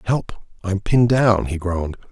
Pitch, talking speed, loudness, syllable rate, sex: 100 Hz, 170 wpm, -19 LUFS, 5.2 syllables/s, male